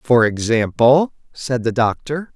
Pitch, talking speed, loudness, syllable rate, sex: 125 Hz, 125 wpm, -17 LUFS, 3.8 syllables/s, male